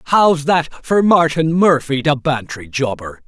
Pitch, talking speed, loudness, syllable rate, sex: 145 Hz, 145 wpm, -16 LUFS, 4.0 syllables/s, male